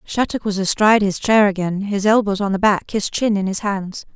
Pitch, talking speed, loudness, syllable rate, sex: 200 Hz, 230 wpm, -18 LUFS, 5.3 syllables/s, female